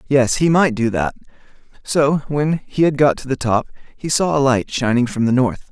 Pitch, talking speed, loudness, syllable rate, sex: 135 Hz, 220 wpm, -17 LUFS, 4.9 syllables/s, male